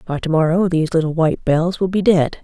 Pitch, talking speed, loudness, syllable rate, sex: 170 Hz, 245 wpm, -17 LUFS, 6.2 syllables/s, female